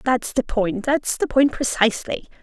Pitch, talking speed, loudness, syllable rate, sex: 240 Hz, 150 wpm, -21 LUFS, 4.8 syllables/s, female